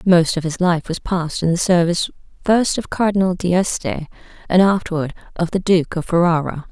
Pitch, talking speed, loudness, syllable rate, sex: 175 Hz, 180 wpm, -18 LUFS, 5.3 syllables/s, female